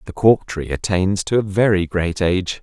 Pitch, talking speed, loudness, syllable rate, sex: 95 Hz, 205 wpm, -18 LUFS, 4.8 syllables/s, male